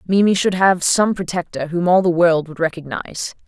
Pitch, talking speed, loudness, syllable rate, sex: 175 Hz, 190 wpm, -17 LUFS, 5.3 syllables/s, female